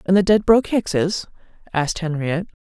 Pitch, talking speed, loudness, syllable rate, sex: 180 Hz, 135 wpm, -19 LUFS, 6.2 syllables/s, female